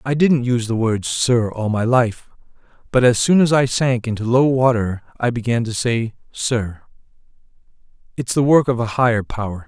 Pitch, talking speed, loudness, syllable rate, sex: 120 Hz, 185 wpm, -18 LUFS, 4.9 syllables/s, male